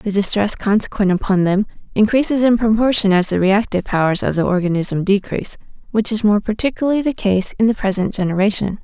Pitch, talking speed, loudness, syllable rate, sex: 205 Hz, 175 wpm, -17 LUFS, 6.0 syllables/s, female